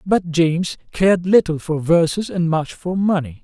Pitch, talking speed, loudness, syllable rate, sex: 175 Hz, 175 wpm, -18 LUFS, 4.7 syllables/s, male